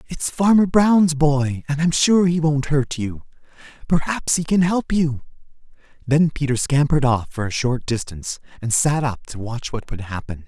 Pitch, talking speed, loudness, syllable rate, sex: 145 Hz, 185 wpm, -20 LUFS, 4.7 syllables/s, male